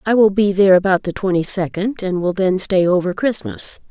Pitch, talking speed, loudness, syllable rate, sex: 190 Hz, 215 wpm, -17 LUFS, 5.5 syllables/s, female